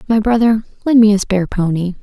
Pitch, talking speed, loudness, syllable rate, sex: 210 Hz, 210 wpm, -14 LUFS, 6.2 syllables/s, female